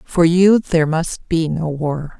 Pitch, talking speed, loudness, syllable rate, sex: 165 Hz, 190 wpm, -17 LUFS, 3.8 syllables/s, female